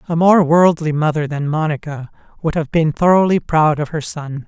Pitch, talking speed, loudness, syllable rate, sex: 160 Hz, 190 wpm, -16 LUFS, 5.0 syllables/s, male